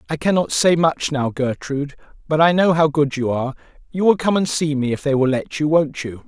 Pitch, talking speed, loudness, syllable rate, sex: 150 Hz, 250 wpm, -19 LUFS, 5.6 syllables/s, male